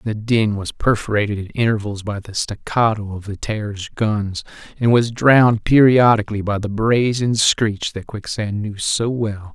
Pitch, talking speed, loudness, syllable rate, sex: 110 Hz, 165 wpm, -18 LUFS, 4.5 syllables/s, male